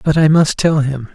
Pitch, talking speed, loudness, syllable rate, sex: 150 Hz, 260 wpm, -14 LUFS, 4.9 syllables/s, male